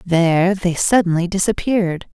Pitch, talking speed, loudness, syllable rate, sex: 185 Hz, 110 wpm, -17 LUFS, 5.0 syllables/s, female